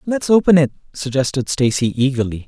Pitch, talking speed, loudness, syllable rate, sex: 140 Hz, 145 wpm, -17 LUFS, 5.6 syllables/s, male